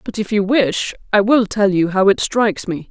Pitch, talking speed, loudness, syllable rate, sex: 205 Hz, 250 wpm, -16 LUFS, 4.9 syllables/s, female